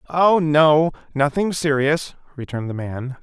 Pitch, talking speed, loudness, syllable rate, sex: 145 Hz, 130 wpm, -19 LUFS, 4.3 syllables/s, male